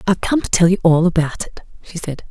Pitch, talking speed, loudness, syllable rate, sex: 175 Hz, 260 wpm, -16 LUFS, 6.5 syllables/s, female